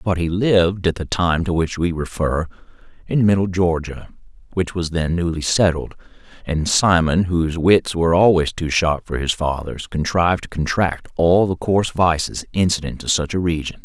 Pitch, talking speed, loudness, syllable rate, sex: 85 Hz, 180 wpm, -19 LUFS, 5.0 syllables/s, male